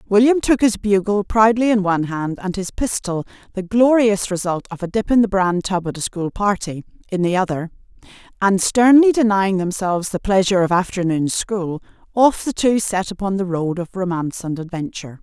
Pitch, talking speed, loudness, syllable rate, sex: 195 Hz, 190 wpm, -18 LUFS, 4.4 syllables/s, female